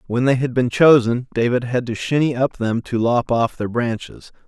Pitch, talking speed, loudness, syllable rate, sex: 120 Hz, 215 wpm, -19 LUFS, 4.9 syllables/s, male